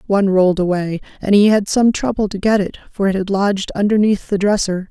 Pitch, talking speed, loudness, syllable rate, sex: 200 Hz, 220 wpm, -16 LUFS, 5.9 syllables/s, female